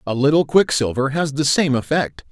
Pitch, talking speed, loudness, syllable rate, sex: 140 Hz, 180 wpm, -18 LUFS, 5.1 syllables/s, male